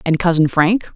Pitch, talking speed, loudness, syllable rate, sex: 175 Hz, 190 wpm, -15 LUFS, 4.9 syllables/s, female